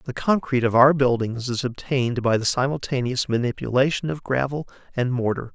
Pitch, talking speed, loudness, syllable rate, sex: 130 Hz, 160 wpm, -22 LUFS, 5.6 syllables/s, male